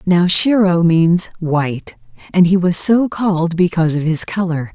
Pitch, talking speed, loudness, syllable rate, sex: 175 Hz, 165 wpm, -15 LUFS, 4.6 syllables/s, female